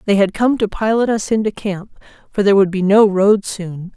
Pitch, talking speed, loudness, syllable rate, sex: 205 Hz, 225 wpm, -15 LUFS, 5.3 syllables/s, female